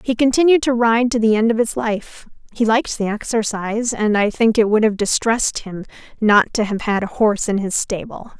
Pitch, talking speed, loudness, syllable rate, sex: 220 Hz, 220 wpm, -17 LUFS, 5.4 syllables/s, female